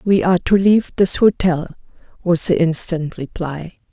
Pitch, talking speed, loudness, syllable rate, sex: 175 Hz, 155 wpm, -17 LUFS, 4.7 syllables/s, female